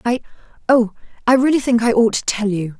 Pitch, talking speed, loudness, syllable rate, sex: 230 Hz, 170 wpm, -17 LUFS, 5.9 syllables/s, female